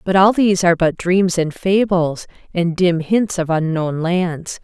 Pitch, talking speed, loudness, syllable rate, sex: 175 Hz, 180 wpm, -17 LUFS, 4.2 syllables/s, female